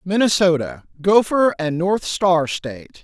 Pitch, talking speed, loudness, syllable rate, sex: 180 Hz, 120 wpm, -18 LUFS, 4.0 syllables/s, male